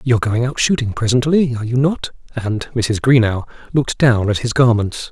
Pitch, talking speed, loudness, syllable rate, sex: 120 Hz, 190 wpm, -17 LUFS, 5.4 syllables/s, male